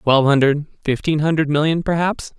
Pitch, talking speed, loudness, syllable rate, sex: 150 Hz, 150 wpm, -18 LUFS, 5.7 syllables/s, male